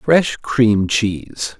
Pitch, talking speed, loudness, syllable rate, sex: 110 Hz, 115 wpm, -17 LUFS, 2.6 syllables/s, male